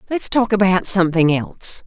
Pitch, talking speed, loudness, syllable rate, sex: 190 Hz, 160 wpm, -16 LUFS, 5.5 syllables/s, male